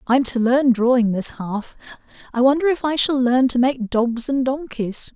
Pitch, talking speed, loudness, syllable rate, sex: 255 Hz, 200 wpm, -19 LUFS, 4.5 syllables/s, female